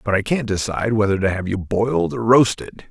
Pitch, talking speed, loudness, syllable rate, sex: 105 Hz, 225 wpm, -19 LUFS, 5.7 syllables/s, male